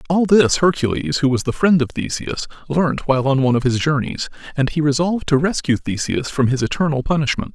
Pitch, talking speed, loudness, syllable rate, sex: 145 Hz, 205 wpm, -18 LUFS, 5.8 syllables/s, male